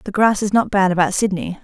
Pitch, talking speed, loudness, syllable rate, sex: 200 Hz, 260 wpm, -17 LUFS, 6.0 syllables/s, female